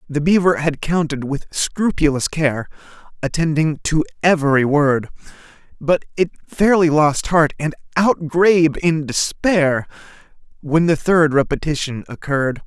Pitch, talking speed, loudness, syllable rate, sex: 155 Hz, 120 wpm, -17 LUFS, 4.3 syllables/s, male